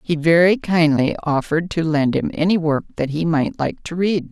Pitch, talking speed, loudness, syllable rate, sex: 165 Hz, 210 wpm, -18 LUFS, 5.0 syllables/s, female